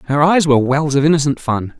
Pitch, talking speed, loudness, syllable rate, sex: 145 Hz, 235 wpm, -15 LUFS, 6.3 syllables/s, male